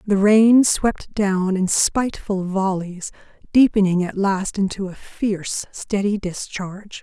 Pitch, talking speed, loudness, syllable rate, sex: 200 Hz, 130 wpm, -19 LUFS, 4.0 syllables/s, female